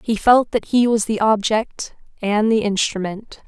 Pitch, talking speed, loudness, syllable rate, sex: 215 Hz, 170 wpm, -18 LUFS, 4.2 syllables/s, female